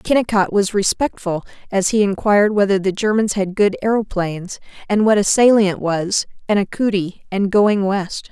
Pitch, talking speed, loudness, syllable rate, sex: 200 Hz, 165 wpm, -17 LUFS, 4.9 syllables/s, female